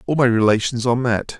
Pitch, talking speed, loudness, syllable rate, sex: 120 Hz, 215 wpm, -18 LUFS, 6.4 syllables/s, male